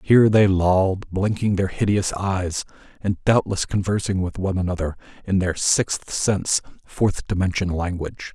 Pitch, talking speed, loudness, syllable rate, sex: 95 Hz, 145 wpm, -21 LUFS, 4.7 syllables/s, male